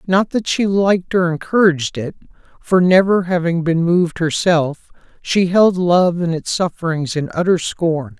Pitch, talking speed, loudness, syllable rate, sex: 175 Hz, 160 wpm, -16 LUFS, 4.5 syllables/s, male